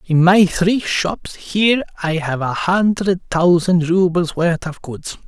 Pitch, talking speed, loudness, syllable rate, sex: 175 Hz, 160 wpm, -16 LUFS, 3.7 syllables/s, male